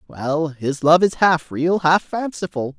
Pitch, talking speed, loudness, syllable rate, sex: 165 Hz, 170 wpm, -19 LUFS, 3.8 syllables/s, male